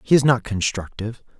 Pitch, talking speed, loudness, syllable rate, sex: 115 Hz, 170 wpm, -21 LUFS, 6.0 syllables/s, male